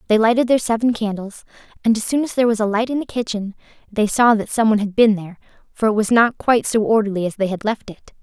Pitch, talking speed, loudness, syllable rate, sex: 220 Hz, 265 wpm, -18 LUFS, 6.7 syllables/s, female